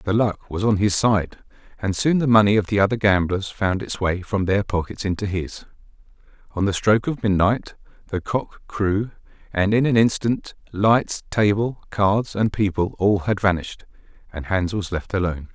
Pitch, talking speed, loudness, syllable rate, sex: 100 Hz, 180 wpm, -21 LUFS, 4.9 syllables/s, male